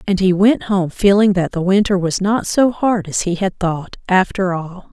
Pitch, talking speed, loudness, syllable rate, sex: 190 Hz, 215 wpm, -16 LUFS, 4.5 syllables/s, female